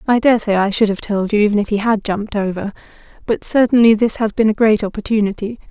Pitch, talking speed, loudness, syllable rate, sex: 215 Hz, 230 wpm, -16 LUFS, 6.3 syllables/s, female